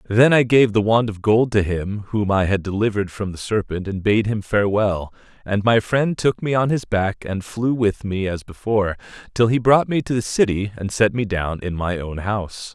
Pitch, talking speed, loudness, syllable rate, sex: 105 Hz, 230 wpm, -20 LUFS, 5.0 syllables/s, male